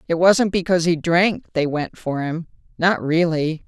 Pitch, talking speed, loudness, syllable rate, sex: 170 Hz, 180 wpm, -19 LUFS, 4.6 syllables/s, female